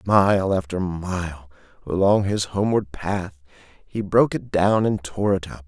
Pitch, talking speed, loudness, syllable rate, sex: 95 Hz, 160 wpm, -22 LUFS, 4.1 syllables/s, male